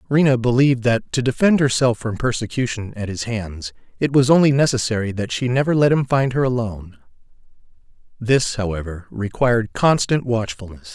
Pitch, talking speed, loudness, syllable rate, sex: 120 Hz, 155 wpm, -19 LUFS, 5.4 syllables/s, male